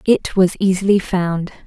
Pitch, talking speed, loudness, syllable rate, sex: 185 Hz, 145 wpm, -17 LUFS, 4.5 syllables/s, female